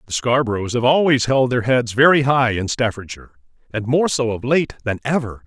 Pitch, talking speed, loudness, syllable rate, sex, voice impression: 125 Hz, 200 wpm, -18 LUFS, 5.3 syllables/s, male, masculine, middle-aged, thick, tensed, powerful, clear, fluent, intellectual, slightly calm, mature, friendly, unique, wild, lively, slightly kind